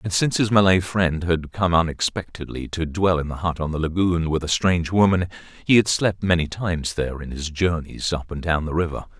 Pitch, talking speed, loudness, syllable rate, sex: 85 Hz, 220 wpm, -22 LUFS, 5.6 syllables/s, male